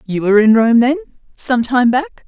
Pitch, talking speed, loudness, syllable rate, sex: 230 Hz, 210 wpm, -13 LUFS, 5.0 syllables/s, female